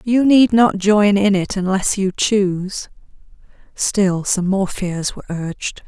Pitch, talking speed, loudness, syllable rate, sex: 195 Hz, 155 wpm, -17 LUFS, 3.9 syllables/s, female